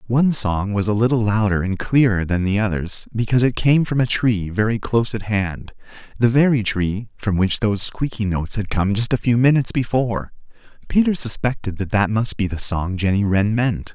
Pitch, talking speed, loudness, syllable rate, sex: 110 Hz, 200 wpm, -19 LUFS, 5.4 syllables/s, male